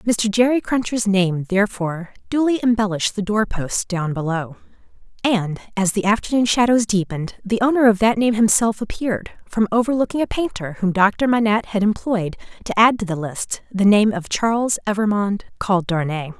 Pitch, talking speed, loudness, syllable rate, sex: 210 Hz, 165 wpm, -19 LUFS, 5.5 syllables/s, female